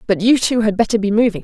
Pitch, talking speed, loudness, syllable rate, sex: 215 Hz, 295 wpm, -15 LUFS, 6.7 syllables/s, female